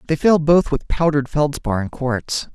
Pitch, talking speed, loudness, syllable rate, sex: 145 Hz, 190 wpm, -19 LUFS, 5.1 syllables/s, male